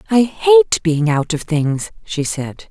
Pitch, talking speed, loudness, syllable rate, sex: 190 Hz, 175 wpm, -16 LUFS, 3.4 syllables/s, female